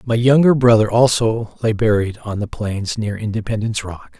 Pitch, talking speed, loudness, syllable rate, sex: 110 Hz, 170 wpm, -17 LUFS, 5.0 syllables/s, male